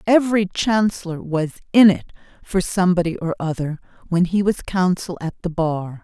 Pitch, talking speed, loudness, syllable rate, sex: 180 Hz, 160 wpm, -20 LUFS, 5.0 syllables/s, female